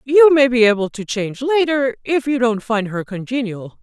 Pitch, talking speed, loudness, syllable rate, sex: 245 Hz, 205 wpm, -17 LUFS, 5.0 syllables/s, female